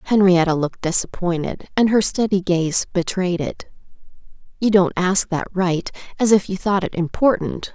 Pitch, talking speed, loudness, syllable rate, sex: 185 Hz, 145 wpm, -19 LUFS, 4.8 syllables/s, female